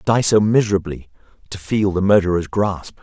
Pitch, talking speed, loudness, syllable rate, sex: 95 Hz, 180 wpm, -17 LUFS, 5.4 syllables/s, male